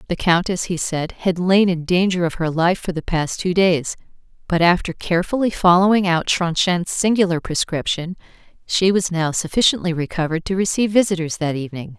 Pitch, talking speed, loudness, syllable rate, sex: 175 Hz, 170 wpm, -19 LUFS, 5.5 syllables/s, female